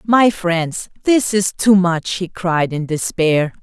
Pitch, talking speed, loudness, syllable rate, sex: 180 Hz, 165 wpm, -17 LUFS, 3.4 syllables/s, female